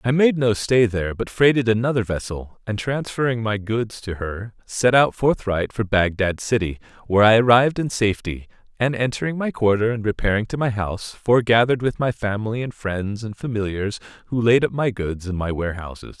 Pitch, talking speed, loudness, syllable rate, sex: 110 Hz, 190 wpm, -21 LUFS, 5.5 syllables/s, male